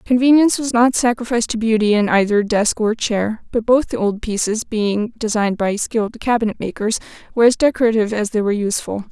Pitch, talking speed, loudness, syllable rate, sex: 225 Hz, 190 wpm, -17 LUFS, 6.1 syllables/s, female